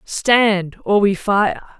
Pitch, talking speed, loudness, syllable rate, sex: 200 Hz, 135 wpm, -16 LUFS, 2.6 syllables/s, female